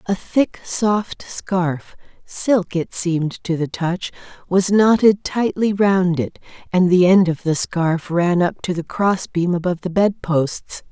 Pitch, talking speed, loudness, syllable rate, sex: 180 Hz, 160 wpm, -19 LUFS, 3.7 syllables/s, female